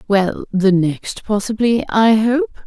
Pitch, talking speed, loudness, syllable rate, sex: 215 Hz, 135 wpm, -16 LUFS, 3.4 syllables/s, female